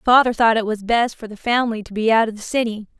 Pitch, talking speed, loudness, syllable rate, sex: 225 Hz, 280 wpm, -19 LUFS, 6.3 syllables/s, female